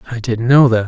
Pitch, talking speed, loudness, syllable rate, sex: 120 Hz, 275 wpm, -13 LUFS, 5.7 syllables/s, male